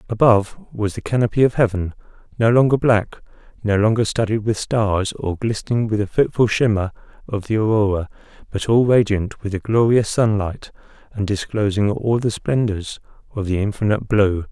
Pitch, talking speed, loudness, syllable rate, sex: 105 Hz, 160 wpm, -19 LUFS, 5.2 syllables/s, male